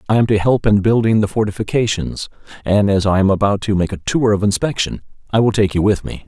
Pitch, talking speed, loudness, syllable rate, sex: 105 Hz, 240 wpm, -16 LUFS, 6.0 syllables/s, male